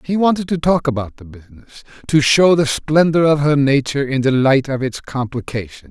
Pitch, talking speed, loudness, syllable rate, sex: 140 Hz, 205 wpm, -16 LUFS, 5.8 syllables/s, male